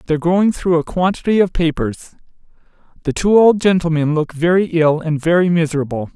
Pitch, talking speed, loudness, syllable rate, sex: 165 Hz, 165 wpm, -16 LUFS, 5.6 syllables/s, male